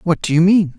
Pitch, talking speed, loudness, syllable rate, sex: 170 Hz, 305 wpm, -14 LUFS, 5.5 syllables/s, male